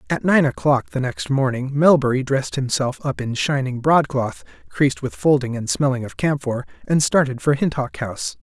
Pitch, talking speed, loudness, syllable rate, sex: 135 Hz, 175 wpm, -20 LUFS, 5.2 syllables/s, male